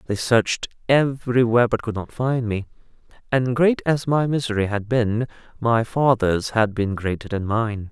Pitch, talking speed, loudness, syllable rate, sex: 115 Hz, 165 wpm, -21 LUFS, 4.7 syllables/s, male